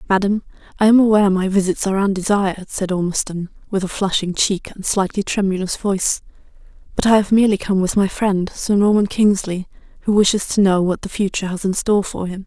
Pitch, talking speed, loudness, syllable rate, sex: 195 Hz, 195 wpm, -18 LUFS, 6.1 syllables/s, female